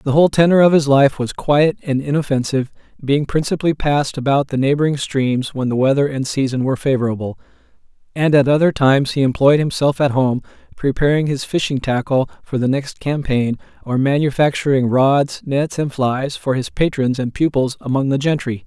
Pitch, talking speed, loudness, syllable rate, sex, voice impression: 140 Hz, 175 wpm, -17 LUFS, 5.5 syllables/s, male, very masculine, slightly young, very adult-like, slightly thick, very tensed, powerful, bright, hard, clear, fluent, slightly raspy, cool, very intellectual, refreshing, sincere, calm, mature, friendly, reassuring, unique, elegant, slightly wild, slightly sweet, lively, kind, slightly modest